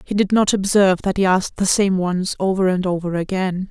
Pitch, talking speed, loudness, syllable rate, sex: 190 Hz, 225 wpm, -18 LUFS, 5.7 syllables/s, female